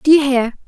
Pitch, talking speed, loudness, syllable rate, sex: 270 Hz, 265 wpm, -15 LUFS, 5.3 syllables/s, female